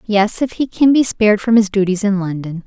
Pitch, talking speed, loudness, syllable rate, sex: 205 Hz, 225 wpm, -15 LUFS, 5.5 syllables/s, female